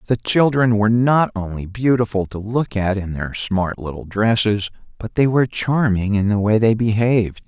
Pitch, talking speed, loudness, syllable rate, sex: 110 Hz, 185 wpm, -18 LUFS, 4.9 syllables/s, male